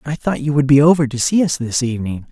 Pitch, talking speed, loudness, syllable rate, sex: 140 Hz, 310 wpm, -16 LUFS, 6.8 syllables/s, male